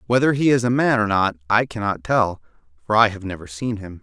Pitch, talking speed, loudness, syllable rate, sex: 110 Hz, 240 wpm, -20 LUFS, 5.8 syllables/s, male